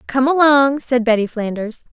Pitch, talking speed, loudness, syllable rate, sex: 255 Hz, 150 wpm, -15 LUFS, 4.6 syllables/s, female